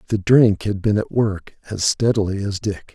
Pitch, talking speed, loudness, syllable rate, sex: 100 Hz, 205 wpm, -19 LUFS, 4.7 syllables/s, male